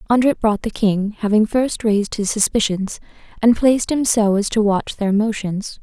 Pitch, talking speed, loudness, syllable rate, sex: 215 Hz, 185 wpm, -18 LUFS, 4.8 syllables/s, female